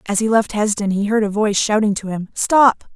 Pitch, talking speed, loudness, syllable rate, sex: 210 Hz, 245 wpm, -17 LUFS, 5.4 syllables/s, female